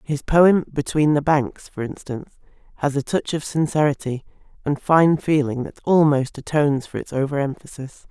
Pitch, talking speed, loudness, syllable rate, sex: 145 Hz, 165 wpm, -20 LUFS, 5.0 syllables/s, female